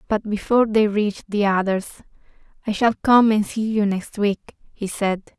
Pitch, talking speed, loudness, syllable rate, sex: 210 Hz, 180 wpm, -20 LUFS, 5.1 syllables/s, female